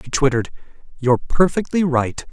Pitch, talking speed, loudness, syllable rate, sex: 145 Hz, 130 wpm, -19 LUFS, 5.8 syllables/s, male